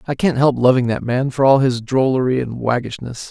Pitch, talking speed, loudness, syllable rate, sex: 130 Hz, 220 wpm, -17 LUFS, 5.4 syllables/s, male